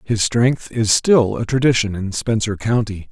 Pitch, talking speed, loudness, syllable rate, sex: 110 Hz, 175 wpm, -18 LUFS, 4.3 syllables/s, male